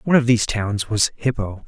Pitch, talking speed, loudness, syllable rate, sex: 115 Hz, 215 wpm, -20 LUFS, 5.9 syllables/s, male